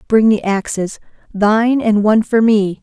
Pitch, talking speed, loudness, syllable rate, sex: 215 Hz, 170 wpm, -14 LUFS, 4.6 syllables/s, female